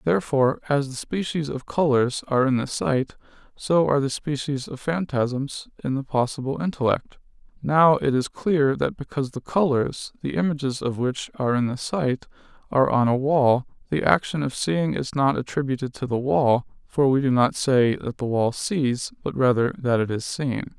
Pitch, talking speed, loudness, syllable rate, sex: 135 Hz, 190 wpm, -23 LUFS, 4.9 syllables/s, male